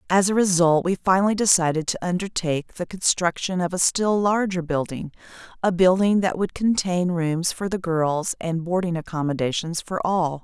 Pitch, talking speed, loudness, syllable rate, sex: 175 Hz, 160 wpm, -22 LUFS, 5.0 syllables/s, female